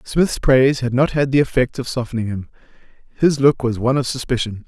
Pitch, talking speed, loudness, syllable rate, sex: 130 Hz, 205 wpm, -18 LUFS, 5.9 syllables/s, male